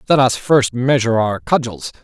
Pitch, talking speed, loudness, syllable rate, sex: 120 Hz, 175 wpm, -16 LUFS, 5.1 syllables/s, male